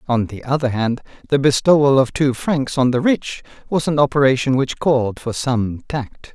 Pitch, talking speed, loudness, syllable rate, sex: 135 Hz, 190 wpm, -18 LUFS, 4.9 syllables/s, male